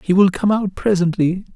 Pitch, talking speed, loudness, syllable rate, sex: 190 Hz, 195 wpm, -17 LUFS, 5.1 syllables/s, male